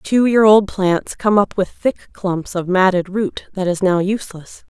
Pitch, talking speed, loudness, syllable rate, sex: 195 Hz, 200 wpm, -17 LUFS, 4.3 syllables/s, female